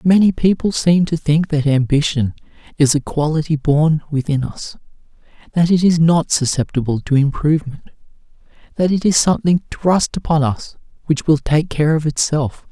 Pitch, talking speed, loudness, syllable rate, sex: 155 Hz, 155 wpm, -16 LUFS, 5.0 syllables/s, male